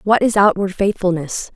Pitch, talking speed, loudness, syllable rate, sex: 195 Hz, 155 wpm, -17 LUFS, 4.9 syllables/s, female